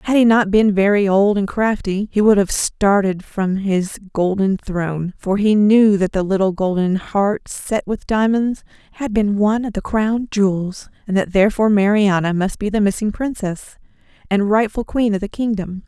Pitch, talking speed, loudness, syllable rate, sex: 205 Hz, 185 wpm, -17 LUFS, 4.8 syllables/s, female